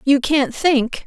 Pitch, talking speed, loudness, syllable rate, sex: 275 Hz, 170 wpm, -17 LUFS, 3.2 syllables/s, female